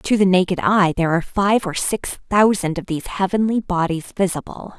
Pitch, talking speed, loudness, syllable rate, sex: 185 Hz, 190 wpm, -19 LUFS, 5.5 syllables/s, female